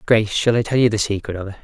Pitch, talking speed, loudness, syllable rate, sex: 110 Hz, 330 wpm, -19 LUFS, 7.5 syllables/s, male